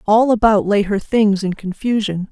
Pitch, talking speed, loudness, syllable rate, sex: 210 Hz, 180 wpm, -16 LUFS, 4.6 syllables/s, female